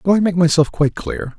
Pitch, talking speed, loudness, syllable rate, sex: 170 Hz, 260 wpm, -17 LUFS, 6.4 syllables/s, male